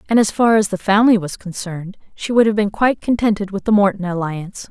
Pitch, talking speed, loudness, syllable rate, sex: 200 Hz, 230 wpm, -17 LUFS, 6.4 syllables/s, female